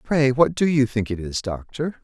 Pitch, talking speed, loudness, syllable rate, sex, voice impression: 125 Hz, 235 wpm, -21 LUFS, 4.7 syllables/s, male, very masculine, adult-like, slightly thick, cool, sincere, slightly calm, slightly kind